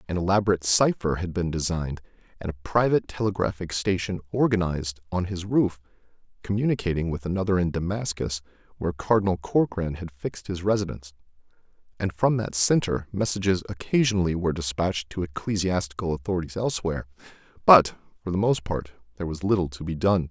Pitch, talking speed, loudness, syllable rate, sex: 90 Hz, 150 wpm, -25 LUFS, 6.3 syllables/s, male